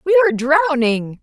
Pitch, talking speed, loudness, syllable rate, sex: 290 Hz, 145 wpm, -16 LUFS, 5.2 syllables/s, female